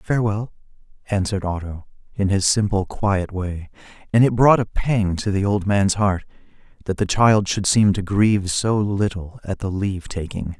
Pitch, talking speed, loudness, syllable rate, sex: 100 Hz, 175 wpm, -20 LUFS, 4.7 syllables/s, male